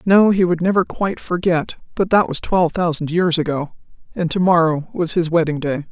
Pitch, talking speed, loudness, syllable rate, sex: 170 Hz, 205 wpm, -18 LUFS, 5.4 syllables/s, female